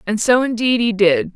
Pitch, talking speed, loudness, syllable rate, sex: 220 Hz, 220 wpm, -16 LUFS, 5.0 syllables/s, female